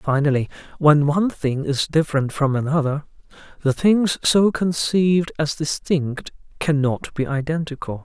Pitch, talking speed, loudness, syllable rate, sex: 150 Hz, 125 wpm, -20 LUFS, 4.6 syllables/s, male